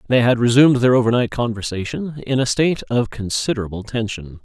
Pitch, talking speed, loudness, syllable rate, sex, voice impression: 120 Hz, 160 wpm, -18 LUFS, 6.1 syllables/s, male, very masculine, very adult-like, very middle-aged, very thick, tensed, powerful, very bright, soft, very clear, fluent, slightly raspy, cool, very intellectual, slightly refreshing, sincere, very calm, mature, very friendly, very reassuring, unique, elegant, wild, sweet, lively, kind